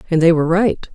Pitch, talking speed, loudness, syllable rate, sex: 170 Hz, 255 wpm, -15 LUFS, 6.8 syllables/s, female